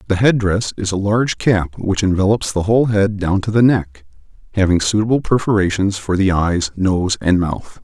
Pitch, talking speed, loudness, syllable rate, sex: 100 Hz, 190 wpm, -16 LUFS, 5.0 syllables/s, male